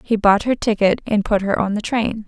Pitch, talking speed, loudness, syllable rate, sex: 210 Hz, 265 wpm, -18 LUFS, 5.2 syllables/s, female